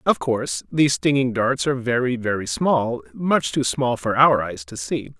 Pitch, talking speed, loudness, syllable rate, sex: 120 Hz, 195 wpm, -21 LUFS, 4.7 syllables/s, male